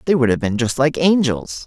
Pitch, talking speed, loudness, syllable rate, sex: 135 Hz, 250 wpm, -17 LUFS, 5.2 syllables/s, male